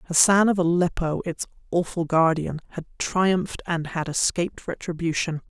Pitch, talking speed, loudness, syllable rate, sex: 170 Hz, 130 wpm, -24 LUFS, 5.0 syllables/s, female